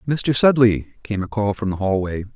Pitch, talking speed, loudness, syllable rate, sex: 105 Hz, 205 wpm, -20 LUFS, 5.0 syllables/s, male